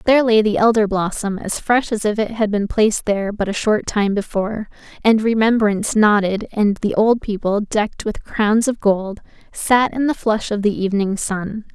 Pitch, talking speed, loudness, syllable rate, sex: 210 Hz, 200 wpm, -18 LUFS, 5.0 syllables/s, female